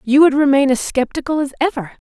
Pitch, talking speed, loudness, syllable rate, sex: 280 Hz, 200 wpm, -16 LUFS, 6.1 syllables/s, female